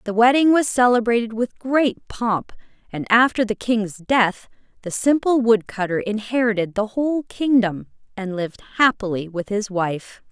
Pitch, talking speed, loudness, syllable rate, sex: 225 Hz, 150 wpm, -20 LUFS, 4.6 syllables/s, female